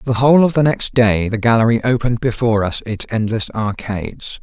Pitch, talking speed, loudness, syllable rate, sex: 115 Hz, 190 wpm, -16 LUFS, 5.7 syllables/s, male